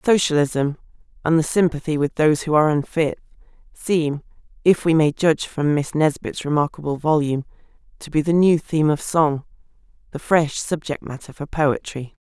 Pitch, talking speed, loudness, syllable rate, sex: 155 Hz, 155 wpm, -20 LUFS, 5.3 syllables/s, female